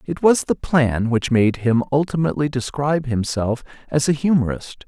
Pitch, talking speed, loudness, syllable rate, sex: 135 Hz, 160 wpm, -20 LUFS, 5.0 syllables/s, male